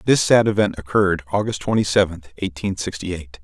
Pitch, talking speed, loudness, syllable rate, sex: 95 Hz, 175 wpm, -20 LUFS, 6.1 syllables/s, male